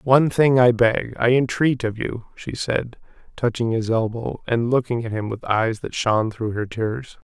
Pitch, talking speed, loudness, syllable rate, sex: 120 Hz, 195 wpm, -21 LUFS, 4.5 syllables/s, male